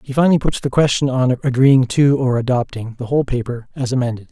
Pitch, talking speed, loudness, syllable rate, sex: 130 Hz, 210 wpm, -17 LUFS, 6.2 syllables/s, male